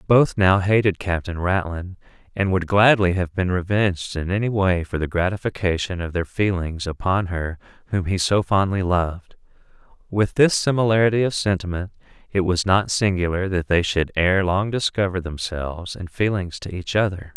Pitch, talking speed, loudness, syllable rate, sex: 95 Hz, 165 wpm, -21 LUFS, 5.0 syllables/s, male